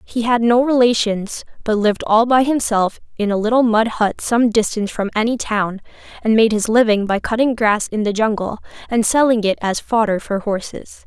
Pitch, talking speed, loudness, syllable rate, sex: 220 Hz, 195 wpm, -17 LUFS, 5.1 syllables/s, female